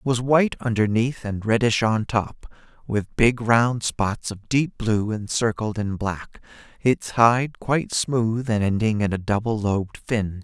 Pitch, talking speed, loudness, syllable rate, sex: 110 Hz, 165 wpm, -22 LUFS, 4.1 syllables/s, male